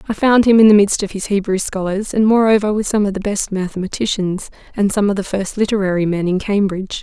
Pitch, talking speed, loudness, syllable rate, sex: 200 Hz, 230 wpm, -16 LUFS, 6.0 syllables/s, female